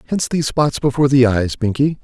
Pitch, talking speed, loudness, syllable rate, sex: 135 Hz, 205 wpm, -16 LUFS, 6.6 syllables/s, male